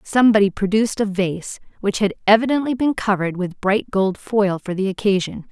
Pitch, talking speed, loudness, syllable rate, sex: 205 Hz, 175 wpm, -19 LUFS, 5.6 syllables/s, female